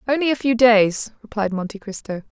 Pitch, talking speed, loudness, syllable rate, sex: 225 Hz, 175 wpm, -19 LUFS, 5.5 syllables/s, female